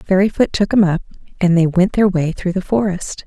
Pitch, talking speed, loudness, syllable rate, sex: 185 Hz, 220 wpm, -16 LUFS, 5.4 syllables/s, female